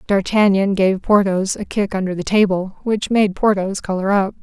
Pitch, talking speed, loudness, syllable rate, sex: 195 Hz, 175 wpm, -17 LUFS, 4.8 syllables/s, female